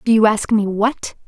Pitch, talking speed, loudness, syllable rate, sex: 215 Hz, 235 wpm, -17 LUFS, 4.6 syllables/s, female